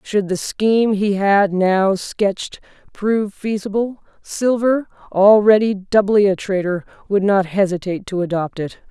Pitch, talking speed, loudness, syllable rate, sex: 200 Hz, 135 wpm, -17 LUFS, 4.4 syllables/s, female